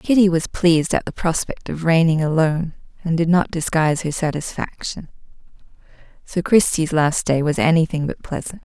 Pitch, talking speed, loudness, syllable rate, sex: 165 Hz, 165 wpm, -19 LUFS, 5.3 syllables/s, female